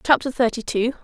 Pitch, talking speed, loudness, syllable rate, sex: 245 Hz, 175 wpm, -21 LUFS, 5.7 syllables/s, female